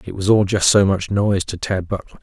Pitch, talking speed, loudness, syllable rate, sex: 100 Hz, 270 wpm, -18 LUFS, 5.8 syllables/s, male